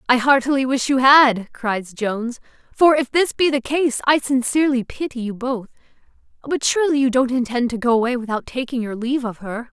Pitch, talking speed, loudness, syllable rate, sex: 255 Hz, 195 wpm, -19 LUFS, 5.4 syllables/s, female